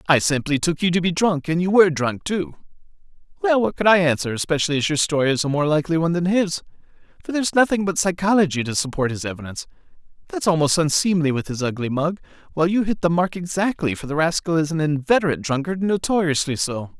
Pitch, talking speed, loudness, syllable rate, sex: 165 Hz, 210 wpm, -20 LUFS, 6.6 syllables/s, male